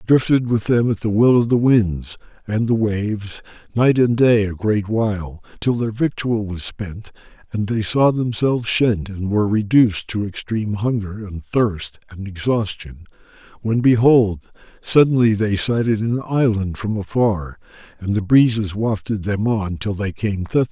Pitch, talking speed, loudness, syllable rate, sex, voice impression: 110 Hz, 170 wpm, -19 LUFS, 4.5 syllables/s, male, masculine, middle-aged, thick, slightly relaxed, powerful, soft, clear, raspy, cool, intellectual, calm, mature, slightly friendly, reassuring, wild, slightly lively, slightly modest